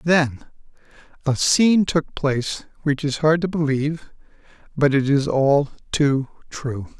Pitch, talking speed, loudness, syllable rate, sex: 145 Hz, 145 wpm, -20 LUFS, 4.3 syllables/s, male